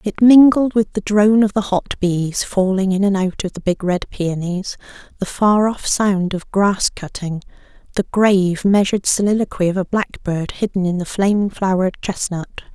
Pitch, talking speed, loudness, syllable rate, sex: 195 Hz, 180 wpm, -17 LUFS, 4.9 syllables/s, female